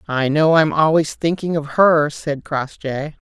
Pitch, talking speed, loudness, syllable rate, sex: 155 Hz, 165 wpm, -18 LUFS, 4.0 syllables/s, female